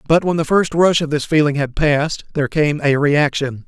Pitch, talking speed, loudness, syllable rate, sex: 150 Hz, 230 wpm, -16 LUFS, 5.3 syllables/s, male